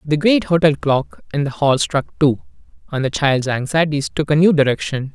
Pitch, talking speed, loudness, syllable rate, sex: 145 Hz, 200 wpm, -17 LUFS, 4.9 syllables/s, male